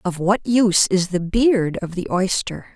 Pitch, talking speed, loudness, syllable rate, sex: 195 Hz, 195 wpm, -19 LUFS, 4.2 syllables/s, female